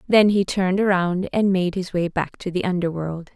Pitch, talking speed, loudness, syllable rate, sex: 185 Hz, 215 wpm, -21 LUFS, 5.1 syllables/s, female